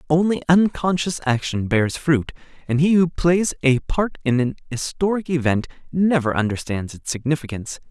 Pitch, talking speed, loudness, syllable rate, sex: 150 Hz, 145 wpm, -21 LUFS, 4.9 syllables/s, male